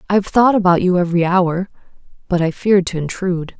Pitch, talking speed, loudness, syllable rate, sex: 185 Hz, 185 wpm, -16 LUFS, 6.4 syllables/s, female